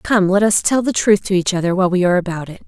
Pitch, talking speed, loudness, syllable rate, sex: 190 Hz, 315 wpm, -16 LUFS, 6.9 syllables/s, female